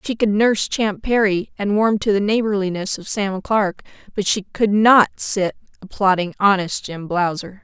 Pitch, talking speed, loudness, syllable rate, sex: 200 Hz, 175 wpm, -19 LUFS, 4.6 syllables/s, female